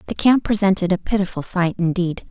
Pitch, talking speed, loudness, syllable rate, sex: 190 Hz, 180 wpm, -19 LUFS, 5.8 syllables/s, female